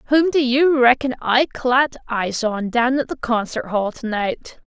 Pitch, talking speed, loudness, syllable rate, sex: 250 Hz, 180 wpm, -19 LUFS, 4.3 syllables/s, female